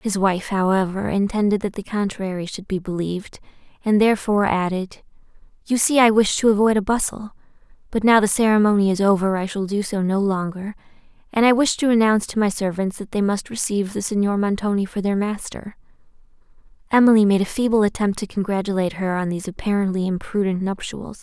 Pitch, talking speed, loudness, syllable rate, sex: 200 Hz, 180 wpm, -20 LUFS, 6.0 syllables/s, female